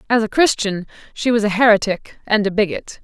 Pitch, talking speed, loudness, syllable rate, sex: 215 Hz, 200 wpm, -17 LUFS, 5.5 syllables/s, female